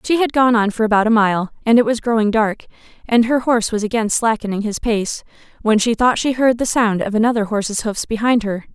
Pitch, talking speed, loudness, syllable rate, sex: 225 Hz, 235 wpm, -17 LUFS, 5.9 syllables/s, female